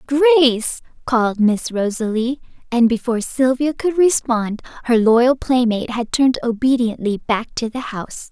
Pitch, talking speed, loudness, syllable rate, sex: 245 Hz, 135 wpm, -18 LUFS, 5.1 syllables/s, female